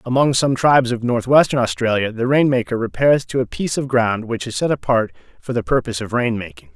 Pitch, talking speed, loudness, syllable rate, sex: 120 Hz, 220 wpm, -18 LUFS, 6.0 syllables/s, male